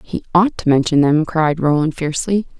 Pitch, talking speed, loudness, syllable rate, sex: 160 Hz, 185 wpm, -16 LUFS, 5.2 syllables/s, female